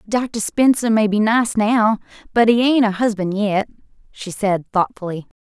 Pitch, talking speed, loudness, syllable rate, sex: 215 Hz, 165 wpm, -18 LUFS, 4.3 syllables/s, female